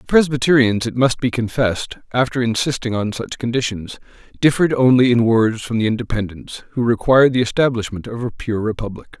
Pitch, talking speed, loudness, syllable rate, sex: 120 Hz, 170 wpm, -18 LUFS, 5.8 syllables/s, male